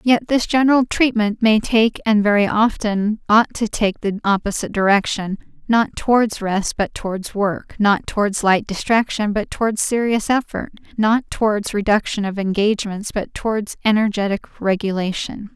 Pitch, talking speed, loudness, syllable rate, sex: 210 Hz, 145 wpm, -18 LUFS, 4.8 syllables/s, female